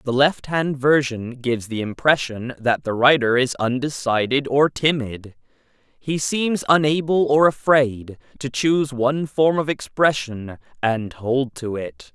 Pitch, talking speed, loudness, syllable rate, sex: 130 Hz, 145 wpm, -20 LUFS, 4.1 syllables/s, male